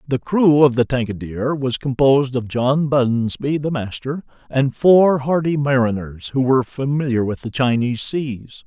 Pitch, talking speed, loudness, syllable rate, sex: 130 Hz, 160 wpm, -18 LUFS, 4.7 syllables/s, male